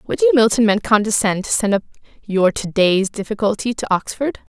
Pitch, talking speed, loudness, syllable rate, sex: 205 Hz, 185 wpm, -17 LUFS, 5.3 syllables/s, female